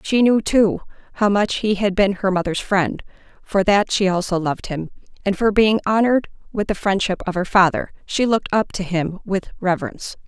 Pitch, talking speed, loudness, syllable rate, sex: 195 Hz, 200 wpm, -19 LUFS, 5.3 syllables/s, female